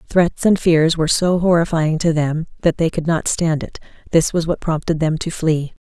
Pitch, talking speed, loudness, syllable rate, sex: 165 Hz, 215 wpm, -18 LUFS, 4.9 syllables/s, female